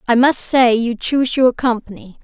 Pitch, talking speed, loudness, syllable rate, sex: 240 Hz, 190 wpm, -15 LUFS, 4.9 syllables/s, female